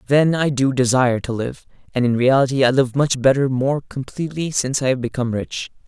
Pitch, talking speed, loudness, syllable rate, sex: 130 Hz, 205 wpm, -19 LUFS, 5.9 syllables/s, male